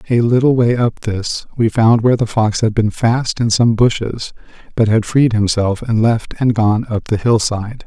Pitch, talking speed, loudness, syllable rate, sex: 115 Hz, 205 wpm, -15 LUFS, 4.6 syllables/s, male